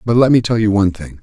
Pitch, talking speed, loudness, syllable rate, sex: 105 Hz, 340 wpm, -14 LUFS, 7.1 syllables/s, male